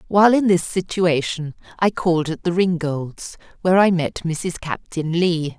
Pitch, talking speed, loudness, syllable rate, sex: 170 Hz, 160 wpm, -20 LUFS, 4.6 syllables/s, female